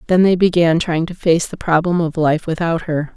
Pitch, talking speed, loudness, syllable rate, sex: 165 Hz, 230 wpm, -16 LUFS, 5.1 syllables/s, female